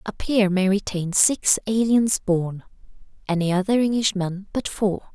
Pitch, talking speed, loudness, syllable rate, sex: 200 Hz, 140 wpm, -21 LUFS, 4.5 syllables/s, female